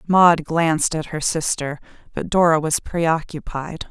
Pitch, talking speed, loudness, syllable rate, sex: 160 Hz, 140 wpm, -20 LUFS, 4.1 syllables/s, female